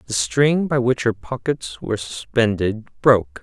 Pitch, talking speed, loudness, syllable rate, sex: 120 Hz, 160 wpm, -20 LUFS, 4.3 syllables/s, male